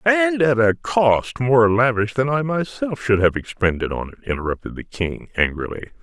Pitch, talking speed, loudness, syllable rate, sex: 115 Hz, 180 wpm, -20 LUFS, 4.9 syllables/s, male